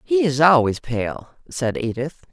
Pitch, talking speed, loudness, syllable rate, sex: 145 Hz, 155 wpm, -20 LUFS, 4.1 syllables/s, female